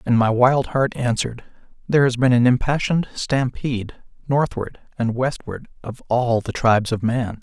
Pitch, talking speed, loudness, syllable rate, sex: 125 Hz, 160 wpm, -20 LUFS, 5.1 syllables/s, male